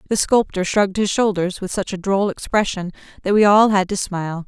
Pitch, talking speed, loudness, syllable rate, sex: 195 Hz, 215 wpm, -18 LUFS, 5.6 syllables/s, female